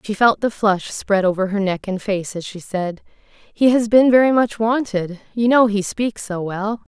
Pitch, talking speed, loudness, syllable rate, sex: 210 Hz, 215 wpm, -18 LUFS, 4.3 syllables/s, female